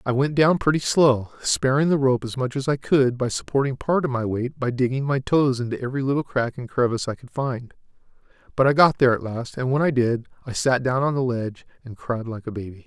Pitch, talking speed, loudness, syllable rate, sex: 130 Hz, 245 wpm, -22 LUFS, 5.9 syllables/s, male